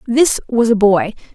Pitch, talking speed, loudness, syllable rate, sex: 225 Hz, 180 wpm, -14 LUFS, 4.4 syllables/s, female